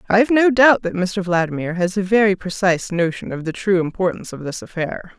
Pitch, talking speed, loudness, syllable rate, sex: 190 Hz, 210 wpm, -18 LUFS, 5.9 syllables/s, female